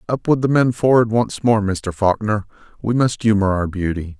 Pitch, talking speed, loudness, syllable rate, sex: 110 Hz, 185 wpm, -18 LUFS, 4.9 syllables/s, male